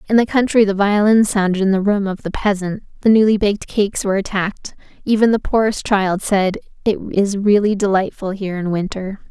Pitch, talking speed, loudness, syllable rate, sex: 200 Hz, 195 wpm, -17 LUFS, 5.8 syllables/s, female